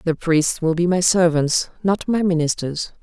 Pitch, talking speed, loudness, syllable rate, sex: 170 Hz, 180 wpm, -19 LUFS, 4.4 syllables/s, female